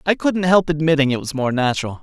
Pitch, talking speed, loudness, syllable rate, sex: 150 Hz, 235 wpm, -18 LUFS, 6.3 syllables/s, male